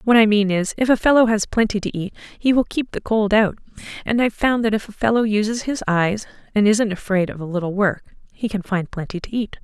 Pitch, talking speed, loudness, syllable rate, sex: 210 Hz, 250 wpm, -20 LUFS, 5.8 syllables/s, female